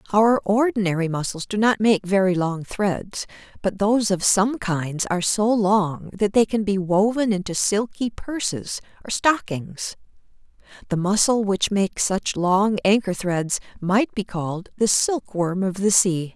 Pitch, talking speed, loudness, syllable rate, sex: 200 Hz, 160 wpm, -21 LUFS, 4.3 syllables/s, female